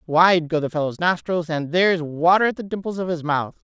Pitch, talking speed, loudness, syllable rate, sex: 170 Hz, 225 wpm, -21 LUFS, 5.5 syllables/s, female